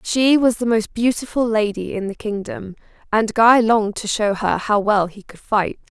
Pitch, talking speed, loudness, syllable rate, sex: 215 Hz, 200 wpm, -18 LUFS, 4.7 syllables/s, female